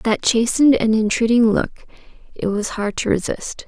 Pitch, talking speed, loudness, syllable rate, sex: 225 Hz, 165 wpm, -18 LUFS, 4.8 syllables/s, female